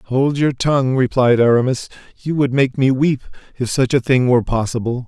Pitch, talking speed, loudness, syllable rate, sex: 130 Hz, 190 wpm, -17 LUFS, 5.1 syllables/s, male